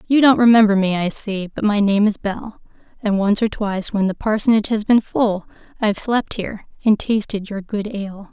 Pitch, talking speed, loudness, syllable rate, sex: 210 Hz, 210 wpm, -18 LUFS, 5.4 syllables/s, female